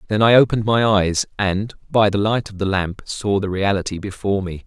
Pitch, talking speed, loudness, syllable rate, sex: 100 Hz, 220 wpm, -19 LUFS, 5.5 syllables/s, male